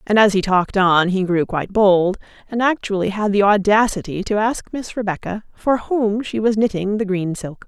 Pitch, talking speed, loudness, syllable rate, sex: 200 Hz, 210 wpm, -18 LUFS, 5.3 syllables/s, female